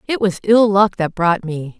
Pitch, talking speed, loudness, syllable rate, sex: 195 Hz, 235 wpm, -16 LUFS, 4.3 syllables/s, female